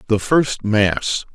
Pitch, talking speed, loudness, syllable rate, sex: 115 Hz, 135 wpm, -18 LUFS, 2.8 syllables/s, male